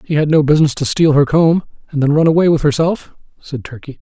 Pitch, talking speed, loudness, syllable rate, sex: 150 Hz, 235 wpm, -13 LUFS, 6.2 syllables/s, male